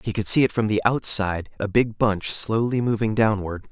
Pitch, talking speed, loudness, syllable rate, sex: 110 Hz, 210 wpm, -22 LUFS, 5.2 syllables/s, male